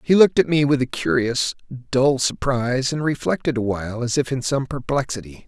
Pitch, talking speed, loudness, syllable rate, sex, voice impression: 130 Hz, 185 wpm, -21 LUFS, 5.4 syllables/s, male, masculine, middle-aged, slightly thick, slightly refreshing, slightly friendly, slightly kind